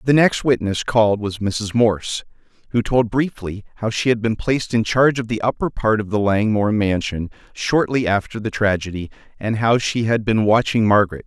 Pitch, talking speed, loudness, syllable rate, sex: 110 Hz, 190 wpm, -19 LUFS, 5.3 syllables/s, male